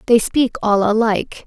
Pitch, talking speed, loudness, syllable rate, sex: 220 Hz, 165 wpm, -17 LUFS, 4.8 syllables/s, female